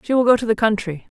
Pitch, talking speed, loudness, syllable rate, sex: 220 Hz, 305 wpm, -18 LUFS, 7.1 syllables/s, female